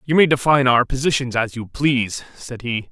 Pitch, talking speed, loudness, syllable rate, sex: 130 Hz, 205 wpm, -18 LUFS, 5.5 syllables/s, male